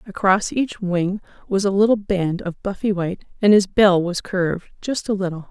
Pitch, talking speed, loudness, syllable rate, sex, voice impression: 195 Hz, 195 wpm, -20 LUFS, 5.0 syllables/s, female, feminine, very adult-like, slightly soft, calm, slightly sweet